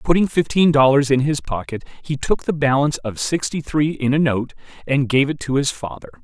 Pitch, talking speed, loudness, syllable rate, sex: 140 Hz, 210 wpm, -19 LUFS, 5.5 syllables/s, male